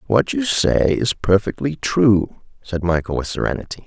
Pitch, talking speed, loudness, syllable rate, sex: 100 Hz, 155 wpm, -19 LUFS, 4.6 syllables/s, male